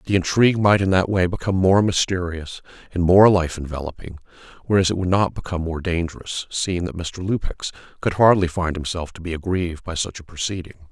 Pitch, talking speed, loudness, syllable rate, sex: 90 Hz, 190 wpm, -21 LUFS, 5.9 syllables/s, male